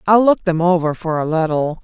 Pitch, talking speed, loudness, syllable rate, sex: 170 Hz, 230 wpm, -16 LUFS, 5.4 syllables/s, female